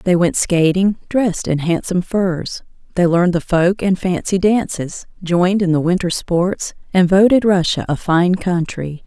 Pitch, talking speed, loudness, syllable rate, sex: 180 Hz, 165 wpm, -16 LUFS, 4.5 syllables/s, female